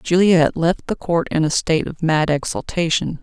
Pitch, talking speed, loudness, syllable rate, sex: 165 Hz, 185 wpm, -18 LUFS, 5.2 syllables/s, female